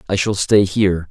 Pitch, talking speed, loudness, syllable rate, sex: 100 Hz, 215 wpm, -16 LUFS, 5.4 syllables/s, male